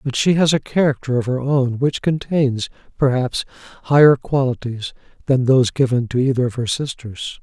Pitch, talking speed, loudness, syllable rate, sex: 130 Hz, 170 wpm, -18 LUFS, 5.1 syllables/s, male